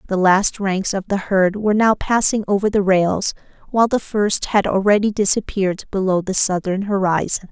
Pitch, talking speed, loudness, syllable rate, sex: 195 Hz, 175 wpm, -18 LUFS, 5.1 syllables/s, female